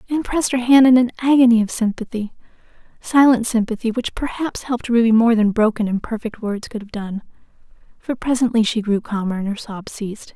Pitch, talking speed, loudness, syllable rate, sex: 230 Hz, 180 wpm, -18 LUFS, 5.9 syllables/s, female